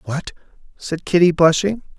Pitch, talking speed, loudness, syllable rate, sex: 170 Hz, 120 wpm, -17 LUFS, 4.6 syllables/s, male